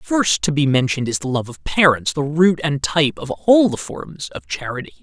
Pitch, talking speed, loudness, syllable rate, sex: 145 Hz, 225 wpm, -18 LUFS, 5.1 syllables/s, male